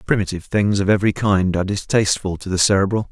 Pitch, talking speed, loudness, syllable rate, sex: 100 Hz, 190 wpm, -18 LUFS, 7.1 syllables/s, male